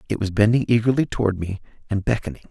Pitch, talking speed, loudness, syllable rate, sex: 105 Hz, 190 wpm, -21 LUFS, 6.8 syllables/s, male